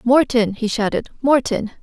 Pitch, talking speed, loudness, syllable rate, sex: 240 Hz, 130 wpm, -18 LUFS, 4.6 syllables/s, female